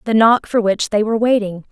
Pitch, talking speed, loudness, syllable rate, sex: 215 Hz, 245 wpm, -16 LUFS, 5.8 syllables/s, female